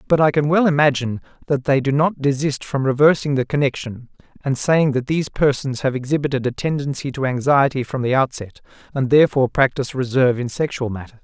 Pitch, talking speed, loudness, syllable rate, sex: 135 Hz, 185 wpm, -19 LUFS, 6.1 syllables/s, male